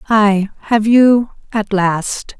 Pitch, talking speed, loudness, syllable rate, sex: 210 Hz, 125 wpm, -14 LUFS, 2.8 syllables/s, female